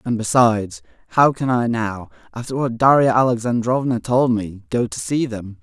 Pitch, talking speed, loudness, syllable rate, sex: 115 Hz, 170 wpm, -19 LUFS, 4.9 syllables/s, male